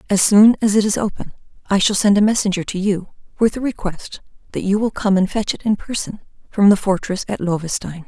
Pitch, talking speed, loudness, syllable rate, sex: 200 Hz, 225 wpm, -18 LUFS, 5.7 syllables/s, female